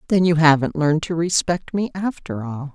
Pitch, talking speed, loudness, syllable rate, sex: 160 Hz, 195 wpm, -20 LUFS, 5.2 syllables/s, female